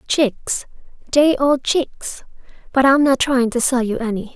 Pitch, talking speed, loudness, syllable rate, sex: 260 Hz, 165 wpm, -17 LUFS, 4.0 syllables/s, female